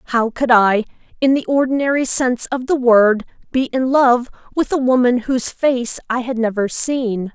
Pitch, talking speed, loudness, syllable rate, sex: 250 Hz, 180 wpm, -17 LUFS, 3.4 syllables/s, female